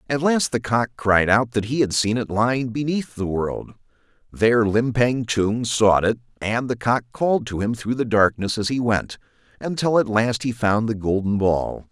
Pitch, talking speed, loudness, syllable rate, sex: 115 Hz, 200 wpm, -21 LUFS, 4.6 syllables/s, male